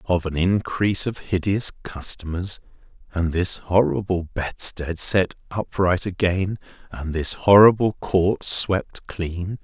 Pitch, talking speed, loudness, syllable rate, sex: 90 Hz, 120 wpm, -21 LUFS, 3.7 syllables/s, male